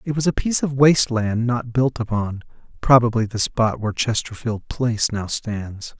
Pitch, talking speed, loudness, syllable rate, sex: 120 Hz, 170 wpm, -20 LUFS, 4.9 syllables/s, male